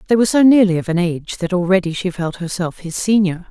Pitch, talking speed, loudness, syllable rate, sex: 185 Hz, 240 wpm, -17 LUFS, 6.4 syllables/s, female